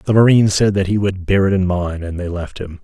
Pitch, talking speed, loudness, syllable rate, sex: 95 Hz, 295 wpm, -16 LUFS, 6.0 syllables/s, male